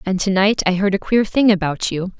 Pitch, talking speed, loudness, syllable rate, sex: 195 Hz, 275 wpm, -17 LUFS, 5.5 syllables/s, female